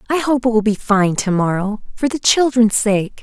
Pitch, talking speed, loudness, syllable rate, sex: 225 Hz, 205 wpm, -16 LUFS, 4.8 syllables/s, female